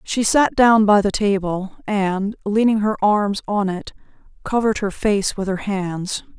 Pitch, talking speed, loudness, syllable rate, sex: 205 Hz, 170 wpm, -19 LUFS, 4.1 syllables/s, female